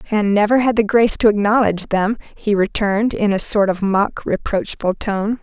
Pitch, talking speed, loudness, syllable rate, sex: 210 Hz, 190 wpm, -17 LUFS, 5.2 syllables/s, female